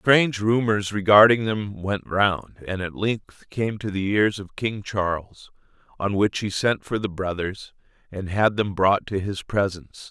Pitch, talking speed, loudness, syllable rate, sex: 100 Hz, 180 wpm, -23 LUFS, 4.1 syllables/s, male